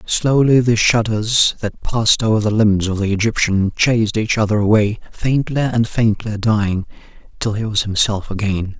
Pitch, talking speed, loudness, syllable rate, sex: 110 Hz, 165 wpm, -16 LUFS, 4.8 syllables/s, male